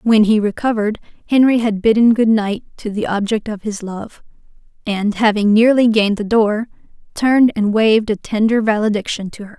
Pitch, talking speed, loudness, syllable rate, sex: 215 Hz, 175 wpm, -16 LUFS, 5.3 syllables/s, female